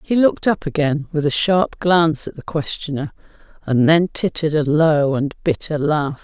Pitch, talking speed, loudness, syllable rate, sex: 155 Hz, 185 wpm, -18 LUFS, 4.9 syllables/s, female